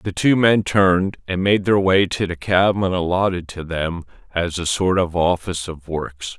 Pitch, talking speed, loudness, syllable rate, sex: 90 Hz, 195 wpm, -19 LUFS, 4.5 syllables/s, male